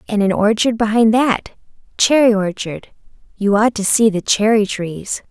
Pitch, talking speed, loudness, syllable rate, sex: 215 Hz, 145 wpm, -16 LUFS, 4.5 syllables/s, female